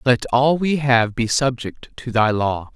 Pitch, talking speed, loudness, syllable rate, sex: 120 Hz, 195 wpm, -18 LUFS, 4.0 syllables/s, male